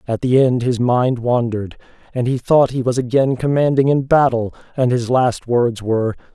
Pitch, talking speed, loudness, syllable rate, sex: 125 Hz, 190 wpm, -17 LUFS, 5.0 syllables/s, male